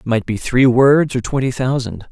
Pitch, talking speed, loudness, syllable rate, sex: 125 Hz, 225 wpm, -16 LUFS, 4.9 syllables/s, male